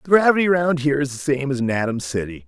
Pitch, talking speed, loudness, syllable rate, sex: 140 Hz, 265 wpm, -20 LUFS, 7.2 syllables/s, male